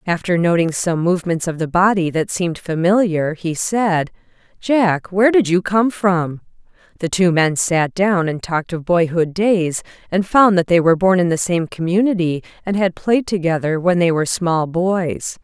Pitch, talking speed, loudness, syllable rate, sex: 180 Hz, 185 wpm, -17 LUFS, 4.8 syllables/s, female